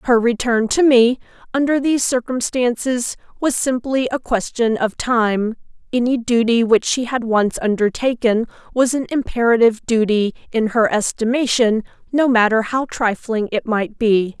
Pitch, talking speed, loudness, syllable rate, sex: 235 Hz, 140 wpm, -18 LUFS, 4.6 syllables/s, female